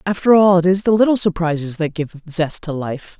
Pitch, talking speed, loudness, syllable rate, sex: 175 Hz, 225 wpm, -16 LUFS, 5.3 syllables/s, female